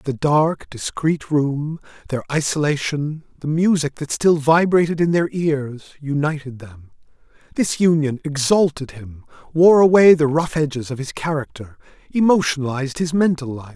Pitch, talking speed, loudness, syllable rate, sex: 150 Hz, 140 wpm, -19 LUFS, 4.6 syllables/s, male